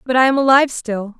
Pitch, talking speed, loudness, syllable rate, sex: 250 Hz, 250 wpm, -15 LUFS, 6.6 syllables/s, female